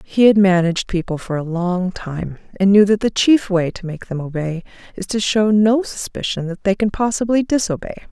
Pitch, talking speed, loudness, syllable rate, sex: 195 Hz, 205 wpm, -18 LUFS, 5.1 syllables/s, female